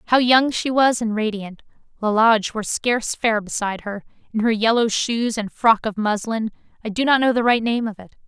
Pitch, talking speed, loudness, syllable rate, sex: 225 Hz, 210 wpm, -20 LUFS, 4.2 syllables/s, female